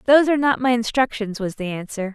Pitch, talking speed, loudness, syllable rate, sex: 235 Hz, 225 wpm, -20 LUFS, 6.5 syllables/s, female